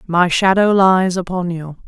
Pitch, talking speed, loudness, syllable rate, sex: 180 Hz, 160 wpm, -15 LUFS, 4.2 syllables/s, female